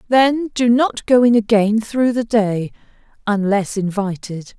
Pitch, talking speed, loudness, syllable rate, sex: 220 Hz, 145 wpm, -17 LUFS, 3.9 syllables/s, female